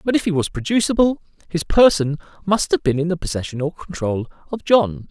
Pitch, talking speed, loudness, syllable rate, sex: 170 Hz, 200 wpm, -19 LUFS, 5.6 syllables/s, male